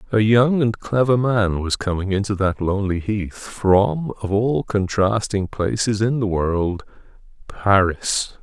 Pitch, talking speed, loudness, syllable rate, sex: 105 Hz, 140 wpm, -20 LUFS, 3.8 syllables/s, male